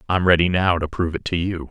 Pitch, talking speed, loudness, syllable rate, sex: 85 Hz, 280 wpm, -20 LUFS, 6.5 syllables/s, male